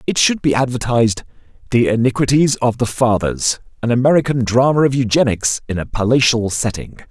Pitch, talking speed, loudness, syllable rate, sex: 120 Hz, 150 wpm, -16 LUFS, 5.6 syllables/s, male